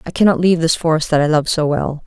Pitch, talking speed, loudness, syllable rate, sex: 160 Hz, 290 wpm, -15 LUFS, 6.7 syllables/s, female